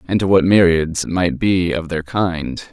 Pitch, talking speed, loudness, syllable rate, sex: 85 Hz, 220 wpm, -17 LUFS, 4.3 syllables/s, male